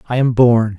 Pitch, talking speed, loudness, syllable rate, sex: 120 Hz, 230 wpm, -13 LUFS, 4.9 syllables/s, male